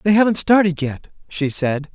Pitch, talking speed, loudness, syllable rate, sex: 170 Hz, 185 wpm, -18 LUFS, 4.8 syllables/s, male